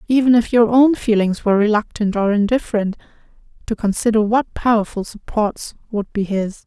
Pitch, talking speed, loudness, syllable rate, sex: 215 Hz, 155 wpm, -17 LUFS, 5.3 syllables/s, female